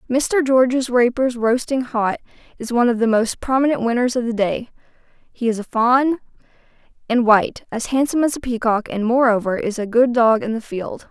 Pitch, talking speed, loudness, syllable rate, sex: 240 Hz, 190 wpm, -18 LUFS, 5.3 syllables/s, female